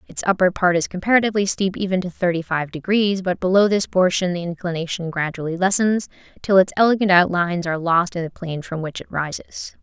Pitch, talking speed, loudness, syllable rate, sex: 180 Hz, 195 wpm, -20 LUFS, 5.9 syllables/s, female